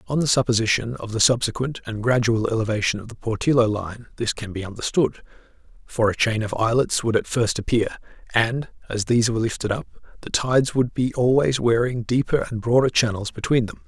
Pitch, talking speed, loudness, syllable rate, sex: 115 Hz, 190 wpm, -22 LUFS, 5.8 syllables/s, male